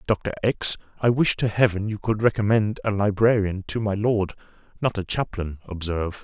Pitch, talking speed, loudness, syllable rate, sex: 105 Hz, 165 wpm, -23 LUFS, 5.1 syllables/s, male